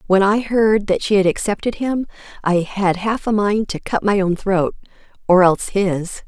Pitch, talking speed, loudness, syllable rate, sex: 200 Hz, 190 wpm, -18 LUFS, 4.6 syllables/s, female